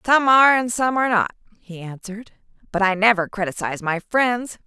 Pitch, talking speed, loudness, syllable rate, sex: 215 Hz, 180 wpm, -19 LUFS, 5.9 syllables/s, female